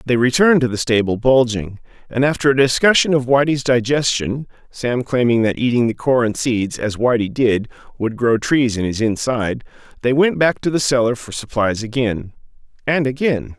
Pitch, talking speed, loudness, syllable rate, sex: 125 Hz, 175 wpm, -17 LUFS, 4.5 syllables/s, male